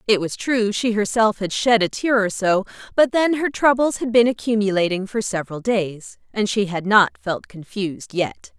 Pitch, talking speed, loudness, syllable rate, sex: 210 Hz, 195 wpm, -20 LUFS, 5.0 syllables/s, female